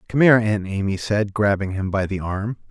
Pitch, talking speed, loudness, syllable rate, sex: 100 Hz, 200 wpm, -21 LUFS, 4.9 syllables/s, male